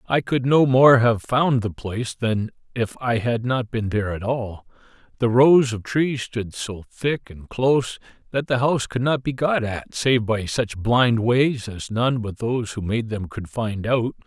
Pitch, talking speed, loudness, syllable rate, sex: 120 Hz, 205 wpm, -21 LUFS, 4.2 syllables/s, male